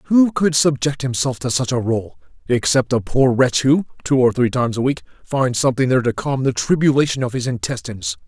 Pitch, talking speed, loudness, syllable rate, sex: 130 Hz, 210 wpm, -18 LUFS, 5.6 syllables/s, male